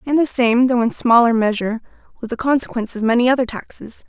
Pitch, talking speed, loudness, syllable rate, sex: 240 Hz, 205 wpm, -17 LUFS, 6.5 syllables/s, female